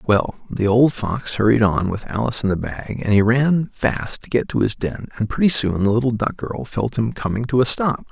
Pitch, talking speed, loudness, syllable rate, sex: 115 Hz, 245 wpm, -20 LUFS, 5.1 syllables/s, male